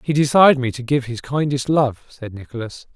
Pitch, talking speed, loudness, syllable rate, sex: 130 Hz, 205 wpm, -18 LUFS, 5.4 syllables/s, male